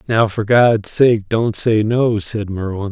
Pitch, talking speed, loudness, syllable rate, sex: 110 Hz, 185 wpm, -16 LUFS, 3.6 syllables/s, male